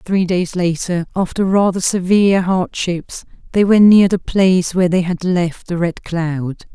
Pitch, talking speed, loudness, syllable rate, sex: 180 Hz, 170 wpm, -15 LUFS, 4.5 syllables/s, female